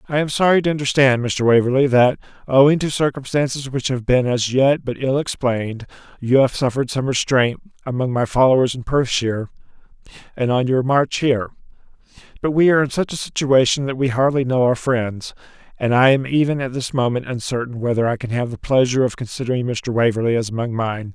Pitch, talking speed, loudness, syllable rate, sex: 130 Hz, 195 wpm, -18 LUFS, 5.9 syllables/s, male